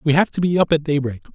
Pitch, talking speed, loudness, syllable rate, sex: 155 Hz, 315 wpm, -19 LUFS, 6.7 syllables/s, male